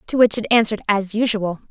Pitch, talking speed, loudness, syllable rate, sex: 215 Hz, 210 wpm, -18 LUFS, 6.2 syllables/s, female